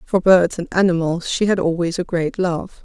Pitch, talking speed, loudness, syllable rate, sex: 175 Hz, 210 wpm, -18 LUFS, 4.8 syllables/s, female